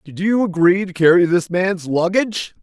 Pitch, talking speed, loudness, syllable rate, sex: 180 Hz, 185 wpm, -17 LUFS, 4.9 syllables/s, male